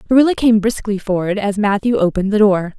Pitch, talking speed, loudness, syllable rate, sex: 210 Hz, 195 wpm, -15 LUFS, 6.2 syllables/s, female